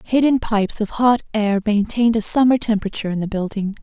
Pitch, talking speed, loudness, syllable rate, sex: 215 Hz, 190 wpm, -18 LUFS, 6.3 syllables/s, female